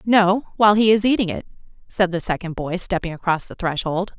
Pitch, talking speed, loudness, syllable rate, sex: 190 Hz, 200 wpm, -20 LUFS, 5.7 syllables/s, female